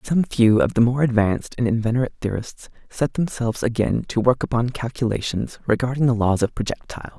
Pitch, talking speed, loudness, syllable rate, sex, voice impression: 115 Hz, 175 wpm, -21 LUFS, 5.9 syllables/s, male, masculine, adult-like, slightly muffled, slightly sincere, very calm, slightly reassuring, kind, slightly modest